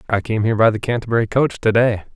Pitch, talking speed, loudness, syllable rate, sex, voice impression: 110 Hz, 225 wpm, -18 LUFS, 7.0 syllables/s, male, masculine, adult-like, slightly thick, cool, sincere, calm, slightly sweet